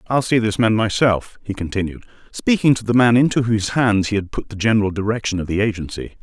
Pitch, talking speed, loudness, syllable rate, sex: 110 Hz, 220 wpm, -18 LUFS, 6.1 syllables/s, male